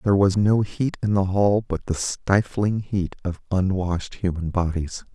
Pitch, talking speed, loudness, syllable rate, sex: 95 Hz, 175 wpm, -23 LUFS, 4.5 syllables/s, male